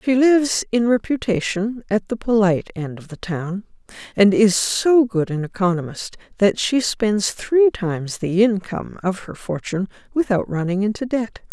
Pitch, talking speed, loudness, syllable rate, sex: 205 Hz, 160 wpm, -20 LUFS, 4.7 syllables/s, female